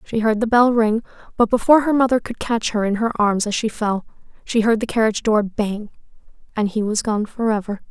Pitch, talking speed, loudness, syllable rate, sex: 220 Hz, 220 wpm, -19 LUFS, 5.6 syllables/s, female